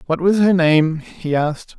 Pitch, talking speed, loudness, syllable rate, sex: 165 Hz, 200 wpm, -17 LUFS, 4.4 syllables/s, male